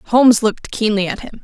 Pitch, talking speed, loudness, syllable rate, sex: 220 Hz, 210 wpm, -16 LUFS, 5.8 syllables/s, female